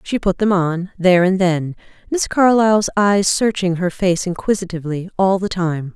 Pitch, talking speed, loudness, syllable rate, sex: 185 Hz, 170 wpm, -17 LUFS, 4.9 syllables/s, female